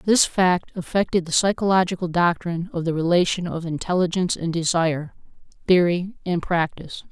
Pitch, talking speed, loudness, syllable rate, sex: 175 Hz, 135 wpm, -22 LUFS, 5.5 syllables/s, female